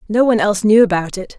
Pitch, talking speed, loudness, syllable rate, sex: 205 Hz, 260 wpm, -14 LUFS, 7.3 syllables/s, female